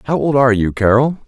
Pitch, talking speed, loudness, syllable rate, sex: 120 Hz, 235 wpm, -14 LUFS, 6.6 syllables/s, male